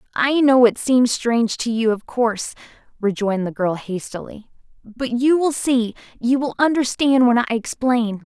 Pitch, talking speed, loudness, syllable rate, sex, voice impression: 240 Hz, 160 wpm, -19 LUFS, 4.7 syllables/s, female, very feminine, slightly young, slightly adult-like, thin, slightly tensed, powerful, bright, hard, clear, fluent, cute, slightly cool, intellectual, very refreshing, sincere, calm, friendly, reassuring, slightly unique, wild, slightly sweet, lively